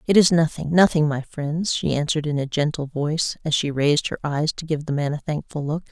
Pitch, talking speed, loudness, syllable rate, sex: 150 Hz, 245 wpm, -22 LUFS, 5.6 syllables/s, female